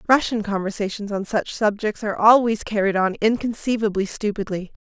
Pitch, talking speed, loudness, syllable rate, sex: 215 Hz, 135 wpm, -21 LUFS, 5.5 syllables/s, female